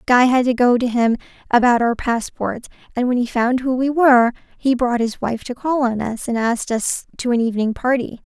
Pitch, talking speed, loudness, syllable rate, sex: 245 Hz, 225 wpm, -18 LUFS, 5.3 syllables/s, female